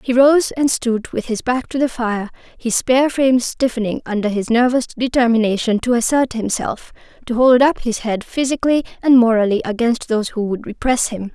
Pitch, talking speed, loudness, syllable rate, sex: 240 Hz, 180 wpm, -17 LUFS, 5.3 syllables/s, female